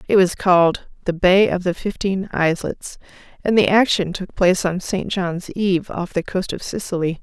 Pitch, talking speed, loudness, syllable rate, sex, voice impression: 185 Hz, 190 wpm, -19 LUFS, 5.1 syllables/s, female, feminine, middle-aged, tensed, powerful, clear, fluent, intellectual, calm, slightly friendly, slightly reassuring, elegant, lively, kind